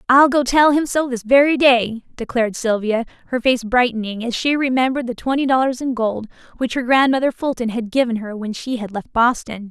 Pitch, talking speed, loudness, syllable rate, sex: 245 Hz, 205 wpm, -18 LUFS, 5.6 syllables/s, female